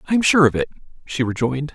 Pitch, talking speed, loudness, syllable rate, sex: 145 Hz, 240 wpm, -19 LUFS, 7.3 syllables/s, male